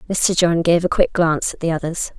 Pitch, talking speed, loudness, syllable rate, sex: 170 Hz, 245 wpm, -18 LUFS, 5.6 syllables/s, female